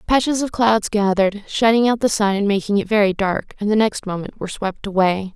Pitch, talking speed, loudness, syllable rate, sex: 210 Hz, 225 wpm, -19 LUFS, 5.8 syllables/s, female